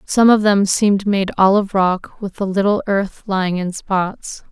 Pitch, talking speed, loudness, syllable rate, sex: 195 Hz, 200 wpm, -17 LUFS, 4.2 syllables/s, female